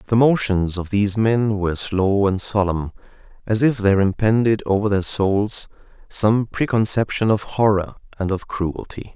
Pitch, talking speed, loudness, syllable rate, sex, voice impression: 105 Hz, 150 wpm, -19 LUFS, 4.6 syllables/s, male, very masculine, very adult-like, thick, tensed, very powerful, slightly dark, soft, slightly muffled, fluent, slightly raspy, cool, intellectual, refreshing, slightly sincere, very calm, mature, very friendly, very reassuring, very unique, slightly elegant, wild, sweet, slightly lively, kind, modest